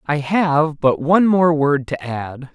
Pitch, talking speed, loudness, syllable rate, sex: 155 Hz, 190 wpm, -17 LUFS, 3.7 syllables/s, male